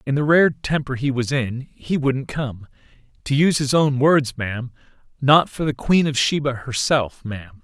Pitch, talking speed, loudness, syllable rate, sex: 135 Hz, 190 wpm, -20 LUFS, 4.8 syllables/s, male